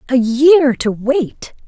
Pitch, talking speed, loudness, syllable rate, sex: 265 Hz, 145 wpm, -13 LUFS, 2.9 syllables/s, female